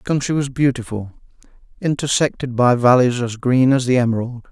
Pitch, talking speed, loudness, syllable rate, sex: 125 Hz, 160 wpm, -18 LUFS, 5.5 syllables/s, male